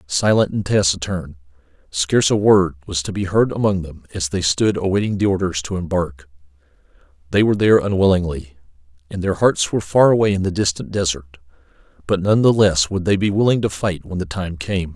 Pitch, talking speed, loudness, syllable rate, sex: 90 Hz, 195 wpm, -18 LUFS, 5.7 syllables/s, male